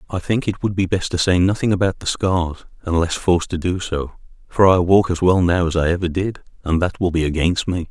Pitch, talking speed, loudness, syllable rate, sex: 90 Hz, 250 wpm, -19 LUFS, 5.5 syllables/s, male